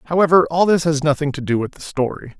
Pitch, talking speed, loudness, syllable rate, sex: 155 Hz, 250 wpm, -18 LUFS, 6.5 syllables/s, male